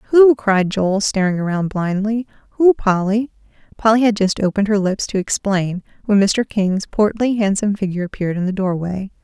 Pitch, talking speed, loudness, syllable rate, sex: 205 Hz, 170 wpm, -17 LUFS, 5.3 syllables/s, female